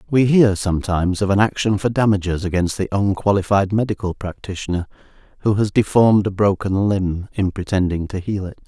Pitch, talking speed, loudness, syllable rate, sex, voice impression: 100 Hz, 165 wpm, -19 LUFS, 5.7 syllables/s, male, very masculine, very adult-like, middle-aged, thick, relaxed, slightly weak, dark, soft, slightly muffled, slightly fluent, slightly cool, intellectual, sincere, very calm, mature, slightly friendly, slightly reassuring, unique, elegant, slightly wild, slightly sweet, kind, slightly modest